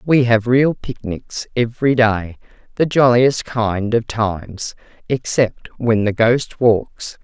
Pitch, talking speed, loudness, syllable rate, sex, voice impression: 115 Hz, 125 wpm, -17 LUFS, 3.5 syllables/s, female, masculine, adult-like, slightly soft, slightly calm, unique